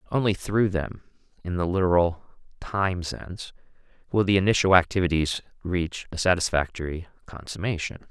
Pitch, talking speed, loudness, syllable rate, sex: 90 Hz, 120 wpm, -25 LUFS, 5.1 syllables/s, male